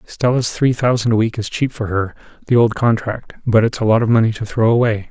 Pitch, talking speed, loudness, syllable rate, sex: 115 Hz, 245 wpm, -17 LUFS, 5.7 syllables/s, male